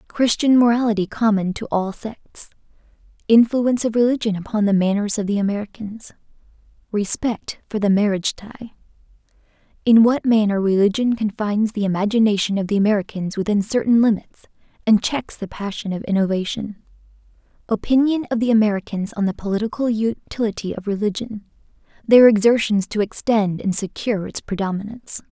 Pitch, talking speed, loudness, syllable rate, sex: 210 Hz, 125 wpm, -19 LUFS, 5.7 syllables/s, female